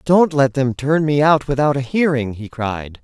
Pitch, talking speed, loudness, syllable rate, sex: 140 Hz, 215 wpm, -17 LUFS, 4.4 syllables/s, male